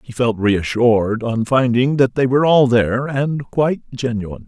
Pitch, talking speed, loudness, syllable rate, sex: 125 Hz, 175 wpm, -17 LUFS, 5.0 syllables/s, male